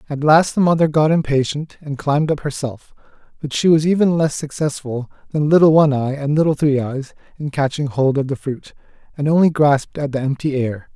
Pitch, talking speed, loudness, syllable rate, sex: 145 Hz, 205 wpm, -18 LUFS, 5.6 syllables/s, male